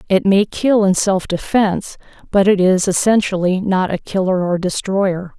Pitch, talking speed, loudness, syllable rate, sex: 190 Hz, 165 wpm, -16 LUFS, 4.5 syllables/s, female